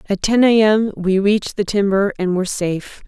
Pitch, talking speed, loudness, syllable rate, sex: 200 Hz, 215 wpm, -17 LUFS, 5.4 syllables/s, female